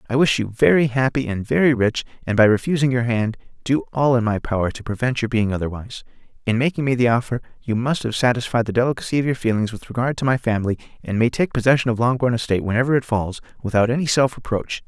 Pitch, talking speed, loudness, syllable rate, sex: 120 Hz, 225 wpm, -20 LUFS, 6.6 syllables/s, male